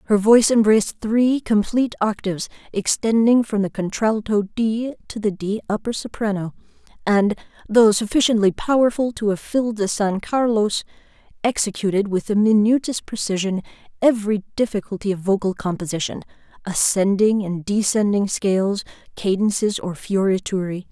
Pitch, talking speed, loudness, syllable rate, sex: 210 Hz, 125 wpm, -20 LUFS, 5.1 syllables/s, female